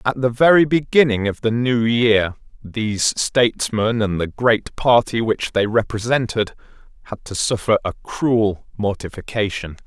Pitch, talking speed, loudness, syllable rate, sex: 115 Hz, 140 wpm, -19 LUFS, 4.4 syllables/s, male